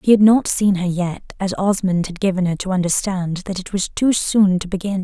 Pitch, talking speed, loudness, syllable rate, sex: 190 Hz, 240 wpm, -18 LUFS, 5.1 syllables/s, female